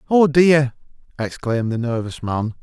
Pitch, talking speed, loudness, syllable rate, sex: 130 Hz, 135 wpm, -19 LUFS, 4.6 syllables/s, male